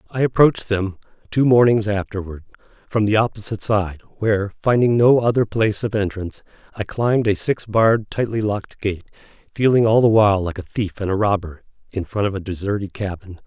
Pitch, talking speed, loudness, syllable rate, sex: 105 Hz, 175 wpm, -19 LUFS, 5.9 syllables/s, male